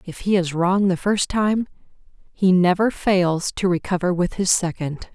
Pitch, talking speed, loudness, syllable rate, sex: 185 Hz, 175 wpm, -20 LUFS, 4.3 syllables/s, female